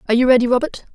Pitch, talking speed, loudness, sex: 250 Hz, 255 wpm, -15 LUFS, female